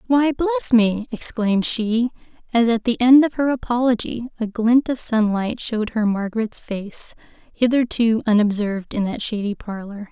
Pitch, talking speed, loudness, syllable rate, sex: 225 Hz, 155 wpm, -20 LUFS, 4.8 syllables/s, female